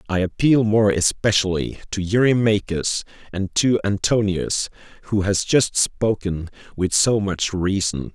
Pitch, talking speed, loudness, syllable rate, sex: 100 Hz, 125 wpm, -20 LUFS, 4.0 syllables/s, male